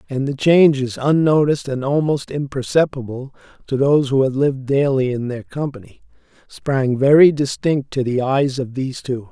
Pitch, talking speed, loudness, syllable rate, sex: 135 Hz, 160 wpm, -18 LUFS, 5.0 syllables/s, male